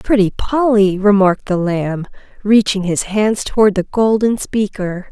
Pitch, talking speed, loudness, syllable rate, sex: 200 Hz, 140 wpm, -15 LUFS, 4.3 syllables/s, female